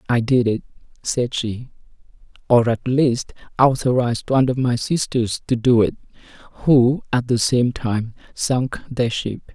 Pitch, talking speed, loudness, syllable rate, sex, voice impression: 120 Hz, 150 wpm, -19 LUFS, 4.3 syllables/s, male, masculine, adult-like, slightly weak, slightly calm, slightly friendly, slightly kind